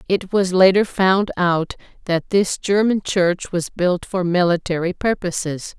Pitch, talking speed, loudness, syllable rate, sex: 185 Hz, 145 wpm, -19 LUFS, 4.1 syllables/s, female